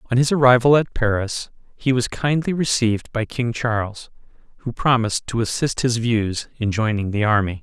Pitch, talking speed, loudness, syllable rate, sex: 115 Hz, 175 wpm, -20 LUFS, 5.1 syllables/s, male